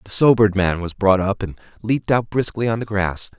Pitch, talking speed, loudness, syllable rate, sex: 105 Hz, 230 wpm, -19 LUFS, 5.7 syllables/s, male